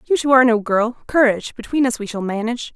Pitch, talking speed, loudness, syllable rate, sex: 235 Hz, 240 wpm, -18 LUFS, 6.8 syllables/s, female